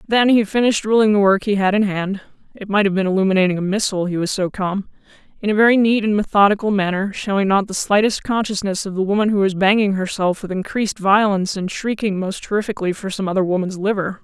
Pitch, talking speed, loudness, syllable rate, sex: 200 Hz, 220 wpm, -18 LUFS, 5.4 syllables/s, female